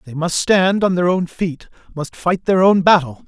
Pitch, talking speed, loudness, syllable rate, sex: 175 Hz, 220 wpm, -16 LUFS, 4.6 syllables/s, male